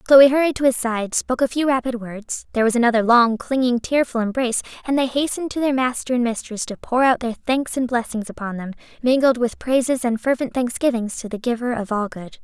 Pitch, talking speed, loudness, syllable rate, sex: 245 Hz, 220 wpm, -20 LUFS, 5.9 syllables/s, female